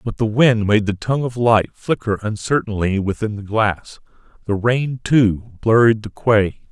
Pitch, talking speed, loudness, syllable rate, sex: 110 Hz, 170 wpm, -18 LUFS, 4.3 syllables/s, male